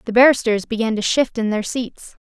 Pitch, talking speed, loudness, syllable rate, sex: 230 Hz, 210 wpm, -18 LUFS, 5.4 syllables/s, female